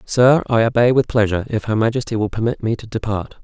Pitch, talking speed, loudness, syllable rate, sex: 115 Hz, 225 wpm, -18 LUFS, 6.3 syllables/s, male